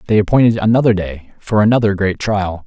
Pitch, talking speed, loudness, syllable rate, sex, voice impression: 100 Hz, 180 wpm, -14 LUFS, 5.8 syllables/s, male, masculine, adult-like, thin, slightly muffled, fluent, cool, intellectual, calm, slightly friendly, reassuring, lively, slightly strict